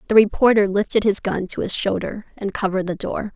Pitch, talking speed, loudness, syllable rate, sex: 205 Hz, 215 wpm, -20 LUFS, 5.9 syllables/s, female